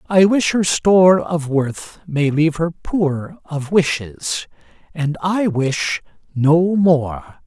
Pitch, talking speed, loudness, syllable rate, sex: 165 Hz, 130 wpm, -17 LUFS, 3.2 syllables/s, male